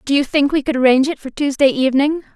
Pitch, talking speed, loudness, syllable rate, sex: 275 Hz, 255 wpm, -16 LUFS, 7.0 syllables/s, female